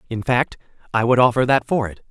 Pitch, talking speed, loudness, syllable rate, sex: 120 Hz, 230 wpm, -19 LUFS, 5.9 syllables/s, male